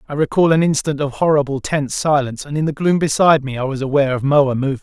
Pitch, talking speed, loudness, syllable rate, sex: 145 Hz, 250 wpm, -17 LUFS, 6.9 syllables/s, male